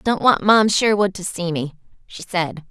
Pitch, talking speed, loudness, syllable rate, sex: 190 Hz, 200 wpm, -18 LUFS, 4.3 syllables/s, female